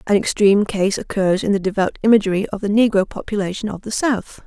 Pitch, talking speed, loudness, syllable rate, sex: 200 Hz, 200 wpm, -18 LUFS, 6.2 syllables/s, female